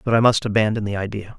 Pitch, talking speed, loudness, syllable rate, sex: 110 Hz, 260 wpm, -20 LUFS, 7.0 syllables/s, male